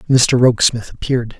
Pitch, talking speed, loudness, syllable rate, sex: 125 Hz, 130 wpm, -14 LUFS, 5.9 syllables/s, male